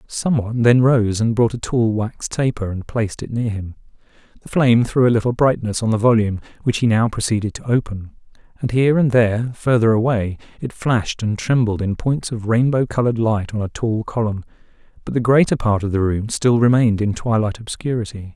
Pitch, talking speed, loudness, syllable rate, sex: 115 Hz, 205 wpm, -18 LUFS, 5.6 syllables/s, male